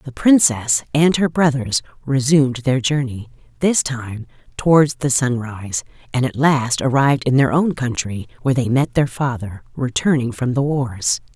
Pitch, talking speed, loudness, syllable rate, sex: 130 Hz, 160 wpm, -18 LUFS, 4.6 syllables/s, female